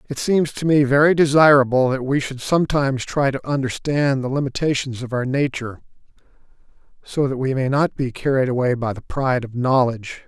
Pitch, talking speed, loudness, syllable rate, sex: 135 Hz, 180 wpm, -19 LUFS, 5.7 syllables/s, male